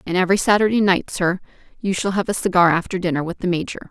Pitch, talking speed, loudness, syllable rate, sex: 185 Hz, 230 wpm, -19 LUFS, 6.9 syllables/s, female